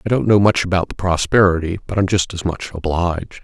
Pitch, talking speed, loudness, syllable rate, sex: 90 Hz, 225 wpm, -17 LUFS, 6.0 syllables/s, male